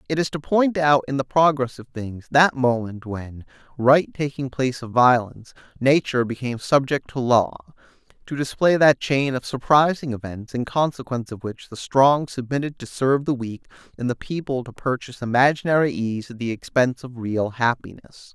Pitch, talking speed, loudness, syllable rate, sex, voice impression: 130 Hz, 175 wpm, -21 LUFS, 5.2 syllables/s, male, masculine, adult-like, tensed, slightly bright, clear, slightly nasal, intellectual, friendly, slightly wild, lively, kind, slightly light